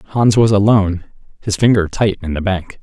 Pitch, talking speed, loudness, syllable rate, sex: 100 Hz, 190 wpm, -15 LUFS, 5.1 syllables/s, male